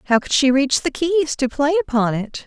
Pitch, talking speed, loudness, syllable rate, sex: 280 Hz, 245 wpm, -18 LUFS, 5.1 syllables/s, female